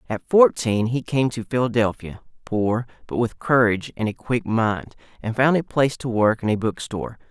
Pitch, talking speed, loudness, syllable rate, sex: 120 Hz, 190 wpm, -22 LUFS, 5.0 syllables/s, male